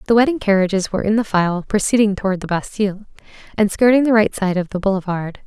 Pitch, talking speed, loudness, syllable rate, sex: 200 Hz, 210 wpm, -18 LUFS, 6.5 syllables/s, female